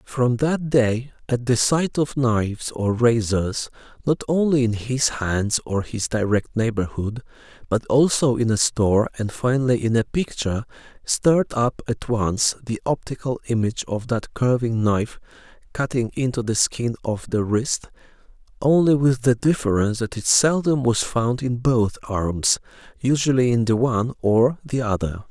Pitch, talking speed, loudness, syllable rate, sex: 120 Hz, 155 wpm, -21 LUFS, 4.5 syllables/s, male